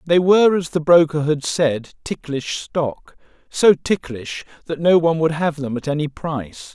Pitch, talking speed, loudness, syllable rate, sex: 155 Hz, 180 wpm, -19 LUFS, 4.6 syllables/s, male